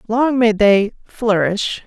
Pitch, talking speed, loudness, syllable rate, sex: 220 Hz, 130 wpm, -16 LUFS, 3.2 syllables/s, female